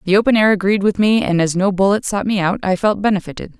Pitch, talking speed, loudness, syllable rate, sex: 200 Hz, 265 wpm, -16 LUFS, 6.5 syllables/s, female